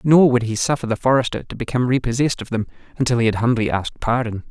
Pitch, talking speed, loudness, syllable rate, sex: 120 Hz, 225 wpm, -19 LUFS, 7.3 syllables/s, male